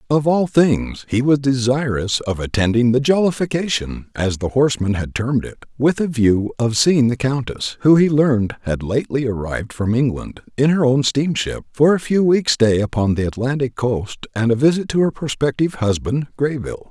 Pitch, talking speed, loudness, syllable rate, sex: 130 Hz, 185 wpm, -18 LUFS, 5.2 syllables/s, male